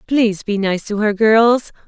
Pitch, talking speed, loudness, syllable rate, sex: 215 Hz, 190 wpm, -16 LUFS, 4.4 syllables/s, female